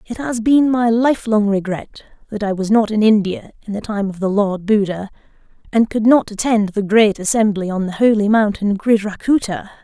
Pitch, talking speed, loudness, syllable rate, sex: 210 Hz, 190 wpm, -16 LUFS, 5.0 syllables/s, female